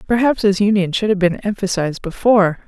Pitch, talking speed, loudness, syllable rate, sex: 200 Hz, 180 wpm, -17 LUFS, 6.1 syllables/s, female